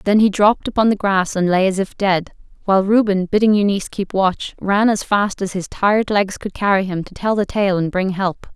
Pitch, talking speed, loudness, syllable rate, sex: 195 Hz, 240 wpm, -17 LUFS, 5.4 syllables/s, female